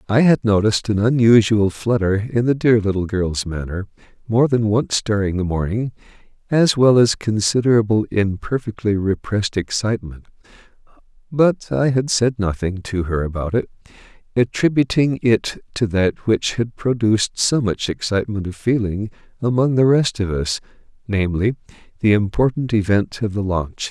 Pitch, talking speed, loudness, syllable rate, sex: 110 Hz, 145 wpm, -19 LUFS, 4.9 syllables/s, male